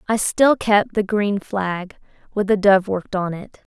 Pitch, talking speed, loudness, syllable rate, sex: 200 Hz, 190 wpm, -19 LUFS, 4.2 syllables/s, female